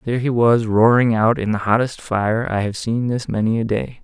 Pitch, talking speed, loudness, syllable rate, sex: 115 Hz, 240 wpm, -18 LUFS, 5.1 syllables/s, male